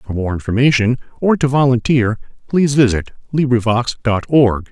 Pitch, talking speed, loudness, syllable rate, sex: 125 Hz, 140 wpm, -16 LUFS, 5.3 syllables/s, male